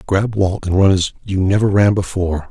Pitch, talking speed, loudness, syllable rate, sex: 95 Hz, 215 wpm, -16 LUFS, 5.3 syllables/s, male